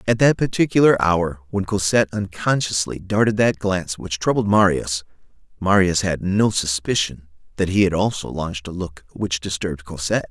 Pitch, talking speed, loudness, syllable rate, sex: 95 Hz, 155 wpm, -20 LUFS, 5.3 syllables/s, male